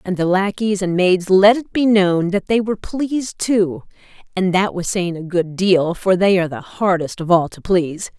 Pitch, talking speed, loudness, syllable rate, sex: 190 Hz, 220 wpm, -17 LUFS, 4.8 syllables/s, female